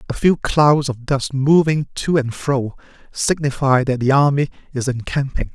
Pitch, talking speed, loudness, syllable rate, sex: 140 Hz, 160 wpm, -18 LUFS, 4.5 syllables/s, male